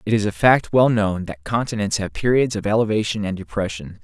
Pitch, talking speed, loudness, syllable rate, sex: 105 Hz, 210 wpm, -20 LUFS, 5.7 syllables/s, male